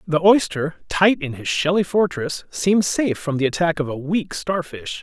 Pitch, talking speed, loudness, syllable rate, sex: 165 Hz, 190 wpm, -20 LUFS, 4.7 syllables/s, male